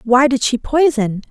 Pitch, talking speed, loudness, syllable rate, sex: 255 Hz, 185 wpm, -15 LUFS, 4.3 syllables/s, female